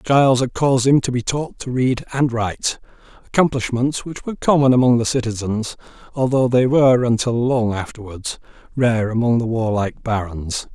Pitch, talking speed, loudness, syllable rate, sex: 120 Hz, 160 wpm, -18 LUFS, 5.3 syllables/s, male